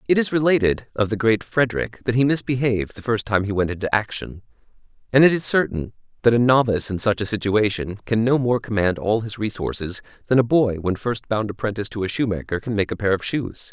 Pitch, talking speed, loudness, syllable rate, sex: 110 Hz, 225 wpm, -21 LUFS, 6.0 syllables/s, male